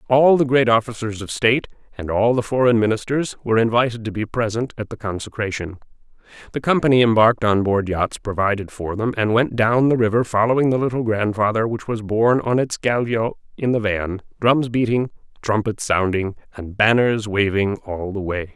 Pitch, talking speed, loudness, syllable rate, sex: 110 Hz, 180 wpm, -19 LUFS, 5.5 syllables/s, male